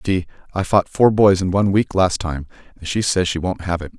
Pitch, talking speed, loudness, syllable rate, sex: 95 Hz, 270 wpm, -18 LUFS, 5.8 syllables/s, male